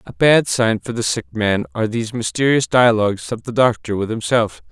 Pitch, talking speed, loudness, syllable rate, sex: 115 Hz, 205 wpm, -18 LUFS, 5.5 syllables/s, male